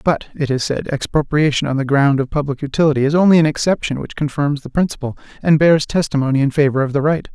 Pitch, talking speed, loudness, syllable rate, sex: 145 Hz, 220 wpm, -17 LUFS, 6.3 syllables/s, male